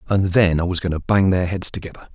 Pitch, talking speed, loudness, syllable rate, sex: 90 Hz, 280 wpm, -19 LUFS, 6.2 syllables/s, male